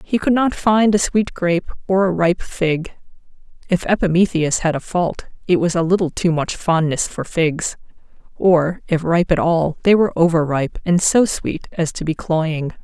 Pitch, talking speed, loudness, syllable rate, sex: 175 Hz, 185 wpm, -18 LUFS, 3.8 syllables/s, female